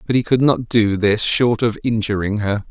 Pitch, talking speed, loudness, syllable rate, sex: 110 Hz, 220 wpm, -17 LUFS, 4.8 syllables/s, male